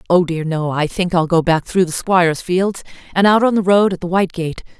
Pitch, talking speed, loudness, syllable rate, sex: 175 Hz, 265 wpm, -16 LUFS, 5.5 syllables/s, female